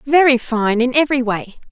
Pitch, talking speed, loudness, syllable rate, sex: 250 Hz, 175 wpm, -16 LUFS, 5.4 syllables/s, female